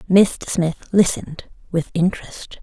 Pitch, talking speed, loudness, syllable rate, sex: 180 Hz, 115 wpm, -19 LUFS, 4.3 syllables/s, female